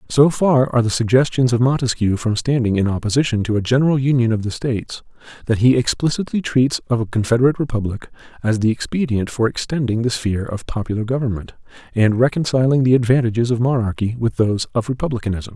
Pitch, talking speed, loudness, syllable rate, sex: 120 Hz, 175 wpm, -18 LUFS, 6.4 syllables/s, male